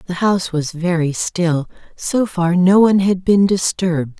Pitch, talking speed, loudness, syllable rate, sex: 180 Hz, 170 wpm, -16 LUFS, 4.6 syllables/s, female